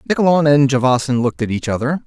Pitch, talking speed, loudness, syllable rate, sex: 135 Hz, 205 wpm, -16 LUFS, 7.0 syllables/s, male